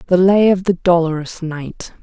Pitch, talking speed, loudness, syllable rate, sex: 175 Hz, 180 wpm, -15 LUFS, 4.6 syllables/s, female